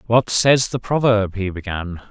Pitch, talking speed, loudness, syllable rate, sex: 110 Hz, 170 wpm, -18 LUFS, 4.2 syllables/s, male